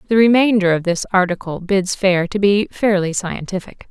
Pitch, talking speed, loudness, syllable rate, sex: 190 Hz, 170 wpm, -17 LUFS, 5.0 syllables/s, female